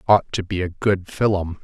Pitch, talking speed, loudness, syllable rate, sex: 95 Hz, 220 wpm, -21 LUFS, 4.7 syllables/s, male